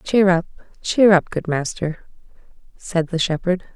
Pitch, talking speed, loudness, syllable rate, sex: 175 Hz, 145 wpm, -19 LUFS, 4.3 syllables/s, female